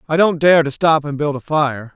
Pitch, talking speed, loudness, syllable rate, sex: 150 Hz, 275 wpm, -16 LUFS, 5.1 syllables/s, male